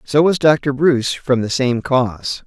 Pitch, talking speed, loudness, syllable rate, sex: 135 Hz, 195 wpm, -16 LUFS, 4.2 syllables/s, male